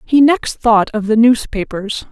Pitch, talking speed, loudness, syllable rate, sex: 230 Hz, 170 wpm, -14 LUFS, 4.0 syllables/s, female